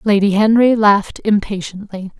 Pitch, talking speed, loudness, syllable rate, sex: 205 Hz, 110 wpm, -14 LUFS, 4.9 syllables/s, female